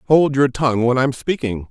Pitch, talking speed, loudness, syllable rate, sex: 130 Hz, 210 wpm, -18 LUFS, 5.3 syllables/s, male